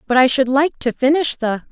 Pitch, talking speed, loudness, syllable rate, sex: 265 Hz, 245 wpm, -17 LUFS, 5.3 syllables/s, female